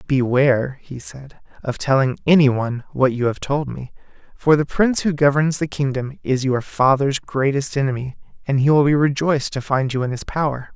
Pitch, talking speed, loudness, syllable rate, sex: 135 Hz, 195 wpm, -19 LUFS, 5.3 syllables/s, male